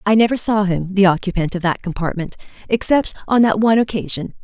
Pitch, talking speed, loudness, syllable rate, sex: 200 Hz, 190 wpm, -17 LUFS, 6.0 syllables/s, female